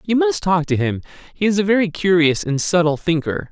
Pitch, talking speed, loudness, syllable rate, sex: 165 Hz, 205 wpm, -18 LUFS, 5.5 syllables/s, male